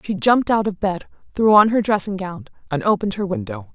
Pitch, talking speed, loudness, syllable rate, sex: 205 Hz, 225 wpm, -19 LUFS, 6.1 syllables/s, female